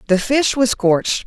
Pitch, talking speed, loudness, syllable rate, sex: 225 Hz, 190 wpm, -16 LUFS, 4.7 syllables/s, female